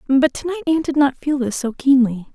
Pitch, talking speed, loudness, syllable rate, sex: 275 Hz, 230 wpm, -18 LUFS, 5.9 syllables/s, female